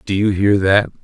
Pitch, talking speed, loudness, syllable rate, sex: 100 Hz, 230 wpm, -15 LUFS, 4.8 syllables/s, male